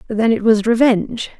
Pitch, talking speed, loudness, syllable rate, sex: 225 Hz, 170 wpm, -15 LUFS, 5.2 syllables/s, female